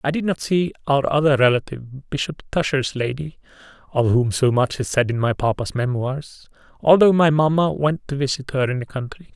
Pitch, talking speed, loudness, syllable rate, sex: 140 Hz, 185 wpm, -20 LUFS, 5.3 syllables/s, male